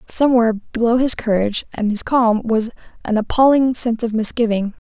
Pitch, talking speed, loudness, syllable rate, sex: 230 Hz, 160 wpm, -17 LUFS, 5.7 syllables/s, female